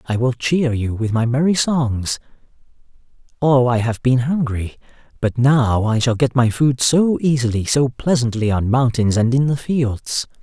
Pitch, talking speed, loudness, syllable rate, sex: 125 Hz, 175 wpm, -18 LUFS, 4.4 syllables/s, male